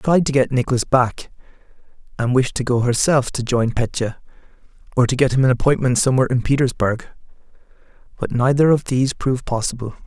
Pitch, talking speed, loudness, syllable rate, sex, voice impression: 125 Hz, 175 wpm, -18 LUFS, 6.4 syllables/s, male, masculine, slightly gender-neutral, adult-like, slightly thick, tensed, slightly powerful, dark, soft, muffled, slightly halting, slightly raspy, slightly cool, intellectual, slightly refreshing, sincere, calm, slightly mature, slightly friendly, slightly reassuring, very unique, slightly elegant, slightly wild, slightly sweet, slightly lively, kind, modest